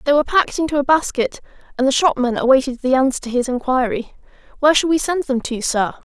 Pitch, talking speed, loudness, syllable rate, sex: 275 Hz, 215 wpm, -18 LUFS, 6.5 syllables/s, female